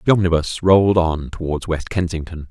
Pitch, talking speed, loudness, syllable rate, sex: 85 Hz, 170 wpm, -18 LUFS, 5.5 syllables/s, male